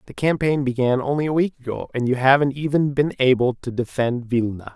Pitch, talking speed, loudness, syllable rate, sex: 135 Hz, 200 wpm, -21 LUFS, 5.6 syllables/s, male